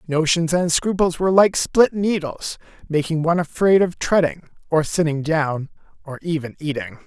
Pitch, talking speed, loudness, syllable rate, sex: 160 Hz, 155 wpm, -20 LUFS, 4.9 syllables/s, male